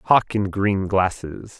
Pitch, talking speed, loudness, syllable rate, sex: 100 Hz, 150 wpm, -21 LUFS, 3.2 syllables/s, male